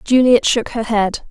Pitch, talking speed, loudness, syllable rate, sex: 230 Hz, 185 wpm, -15 LUFS, 4.2 syllables/s, female